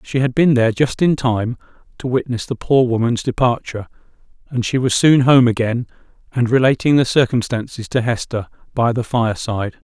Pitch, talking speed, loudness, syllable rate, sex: 120 Hz, 170 wpm, -17 LUFS, 5.5 syllables/s, male